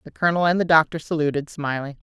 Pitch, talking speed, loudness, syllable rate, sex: 155 Hz, 205 wpm, -21 LUFS, 6.9 syllables/s, female